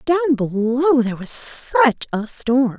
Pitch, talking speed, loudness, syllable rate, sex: 255 Hz, 150 wpm, -18 LUFS, 3.8 syllables/s, female